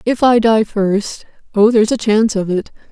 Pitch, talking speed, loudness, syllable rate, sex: 215 Hz, 205 wpm, -14 LUFS, 5.6 syllables/s, female